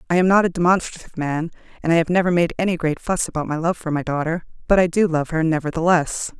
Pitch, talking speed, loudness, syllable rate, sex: 170 Hz, 245 wpm, -20 LUFS, 6.7 syllables/s, female